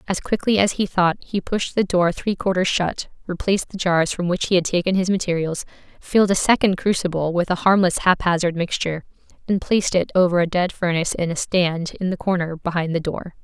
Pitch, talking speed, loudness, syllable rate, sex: 180 Hz, 210 wpm, -20 LUFS, 5.7 syllables/s, female